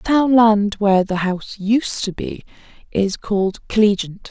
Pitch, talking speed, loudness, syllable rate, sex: 210 Hz, 165 wpm, -18 LUFS, 4.6 syllables/s, female